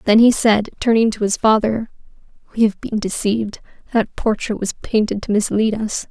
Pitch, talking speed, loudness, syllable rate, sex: 215 Hz, 175 wpm, -18 LUFS, 5.1 syllables/s, female